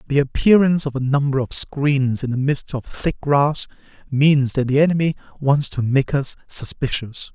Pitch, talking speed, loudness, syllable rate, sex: 140 Hz, 180 wpm, -19 LUFS, 4.7 syllables/s, male